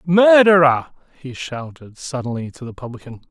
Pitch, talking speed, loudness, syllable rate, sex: 145 Hz, 125 wpm, -16 LUFS, 4.9 syllables/s, male